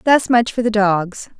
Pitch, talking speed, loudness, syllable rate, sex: 215 Hz, 215 wpm, -16 LUFS, 4.2 syllables/s, female